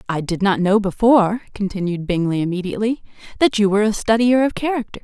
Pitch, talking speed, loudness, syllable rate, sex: 205 Hz, 180 wpm, -18 LUFS, 6.4 syllables/s, female